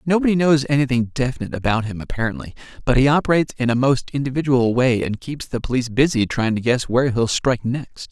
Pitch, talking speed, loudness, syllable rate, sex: 130 Hz, 200 wpm, -19 LUFS, 6.4 syllables/s, male